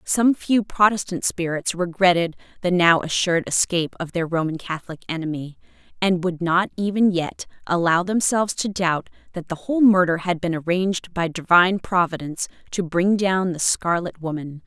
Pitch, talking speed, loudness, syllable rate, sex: 175 Hz, 160 wpm, -21 LUFS, 5.2 syllables/s, female